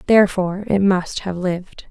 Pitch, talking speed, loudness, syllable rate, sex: 190 Hz, 155 wpm, -19 LUFS, 5.3 syllables/s, female